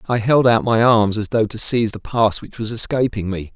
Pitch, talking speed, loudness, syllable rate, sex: 115 Hz, 255 wpm, -17 LUFS, 5.3 syllables/s, male